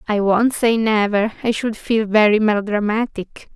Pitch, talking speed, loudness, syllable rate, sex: 215 Hz, 150 wpm, -17 LUFS, 4.6 syllables/s, female